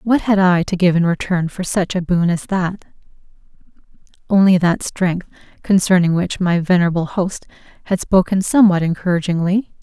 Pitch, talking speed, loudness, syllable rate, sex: 180 Hz, 155 wpm, -16 LUFS, 5.2 syllables/s, female